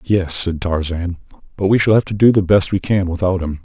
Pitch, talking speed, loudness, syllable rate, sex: 90 Hz, 245 wpm, -16 LUFS, 5.4 syllables/s, male